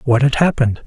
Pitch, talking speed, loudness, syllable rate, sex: 130 Hz, 205 wpm, -15 LUFS, 6.5 syllables/s, male